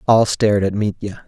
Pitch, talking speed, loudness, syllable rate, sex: 105 Hz, 190 wpm, -17 LUFS, 5.4 syllables/s, male